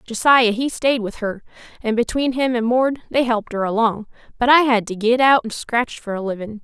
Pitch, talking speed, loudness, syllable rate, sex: 235 Hz, 225 wpm, -18 LUFS, 5.3 syllables/s, female